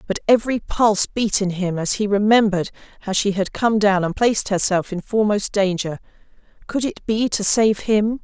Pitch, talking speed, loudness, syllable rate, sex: 205 Hz, 180 wpm, -19 LUFS, 5.3 syllables/s, female